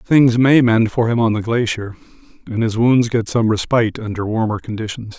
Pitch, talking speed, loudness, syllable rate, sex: 115 Hz, 195 wpm, -17 LUFS, 5.2 syllables/s, male